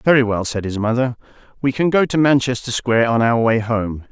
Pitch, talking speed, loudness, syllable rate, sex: 120 Hz, 220 wpm, -18 LUFS, 5.5 syllables/s, male